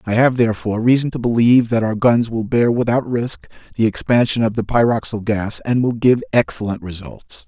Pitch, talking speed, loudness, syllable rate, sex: 115 Hz, 195 wpm, -17 LUFS, 5.6 syllables/s, male